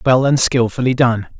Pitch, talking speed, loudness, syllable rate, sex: 125 Hz, 170 wpm, -15 LUFS, 5.0 syllables/s, male